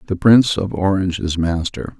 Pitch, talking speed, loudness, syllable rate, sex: 95 Hz, 180 wpm, -17 LUFS, 5.5 syllables/s, male